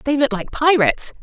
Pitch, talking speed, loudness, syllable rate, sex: 270 Hz, 195 wpm, -17 LUFS, 5.4 syllables/s, female